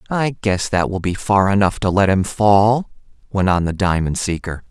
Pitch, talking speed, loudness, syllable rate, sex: 100 Hz, 205 wpm, -17 LUFS, 4.8 syllables/s, male